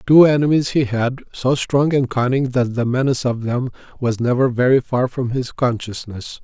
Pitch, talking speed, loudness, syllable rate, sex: 125 Hz, 185 wpm, -18 LUFS, 5.0 syllables/s, male